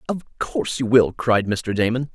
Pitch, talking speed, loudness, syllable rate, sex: 115 Hz, 195 wpm, -21 LUFS, 4.6 syllables/s, male